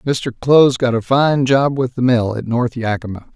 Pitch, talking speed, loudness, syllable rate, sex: 125 Hz, 215 wpm, -16 LUFS, 4.4 syllables/s, male